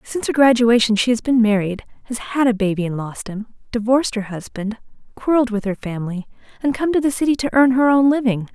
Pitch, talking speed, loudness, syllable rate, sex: 235 Hz, 220 wpm, -18 LUFS, 6.2 syllables/s, female